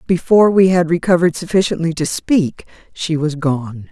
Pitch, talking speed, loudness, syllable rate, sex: 165 Hz, 155 wpm, -15 LUFS, 5.2 syllables/s, female